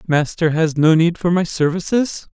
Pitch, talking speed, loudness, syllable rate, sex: 165 Hz, 180 wpm, -17 LUFS, 4.6 syllables/s, male